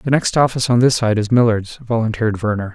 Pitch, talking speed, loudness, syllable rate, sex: 115 Hz, 220 wpm, -17 LUFS, 6.3 syllables/s, male